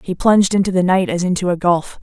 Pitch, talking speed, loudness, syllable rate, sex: 185 Hz, 265 wpm, -16 LUFS, 6.3 syllables/s, female